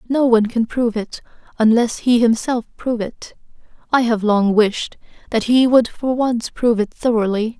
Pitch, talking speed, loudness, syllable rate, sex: 230 Hz, 175 wpm, -17 LUFS, 4.9 syllables/s, female